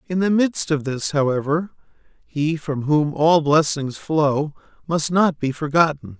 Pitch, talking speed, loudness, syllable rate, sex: 155 Hz, 155 wpm, -20 LUFS, 4.0 syllables/s, male